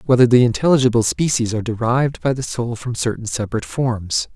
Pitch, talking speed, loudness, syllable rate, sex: 120 Hz, 180 wpm, -18 LUFS, 6.2 syllables/s, male